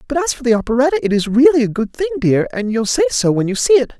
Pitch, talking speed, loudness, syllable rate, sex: 255 Hz, 300 wpm, -15 LUFS, 6.7 syllables/s, female